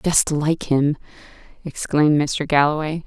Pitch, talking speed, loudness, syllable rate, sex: 150 Hz, 115 wpm, -19 LUFS, 4.3 syllables/s, female